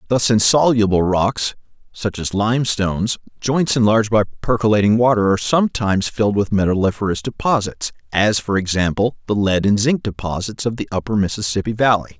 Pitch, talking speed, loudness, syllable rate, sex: 105 Hz, 150 wpm, -18 LUFS, 5.7 syllables/s, male